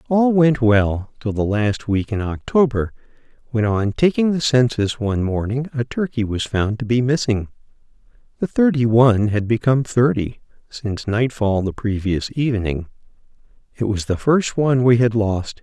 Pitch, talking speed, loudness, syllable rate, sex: 120 Hz, 160 wpm, -19 LUFS, 4.8 syllables/s, male